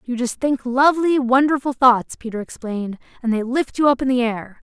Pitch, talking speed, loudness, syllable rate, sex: 250 Hz, 205 wpm, -19 LUFS, 5.3 syllables/s, female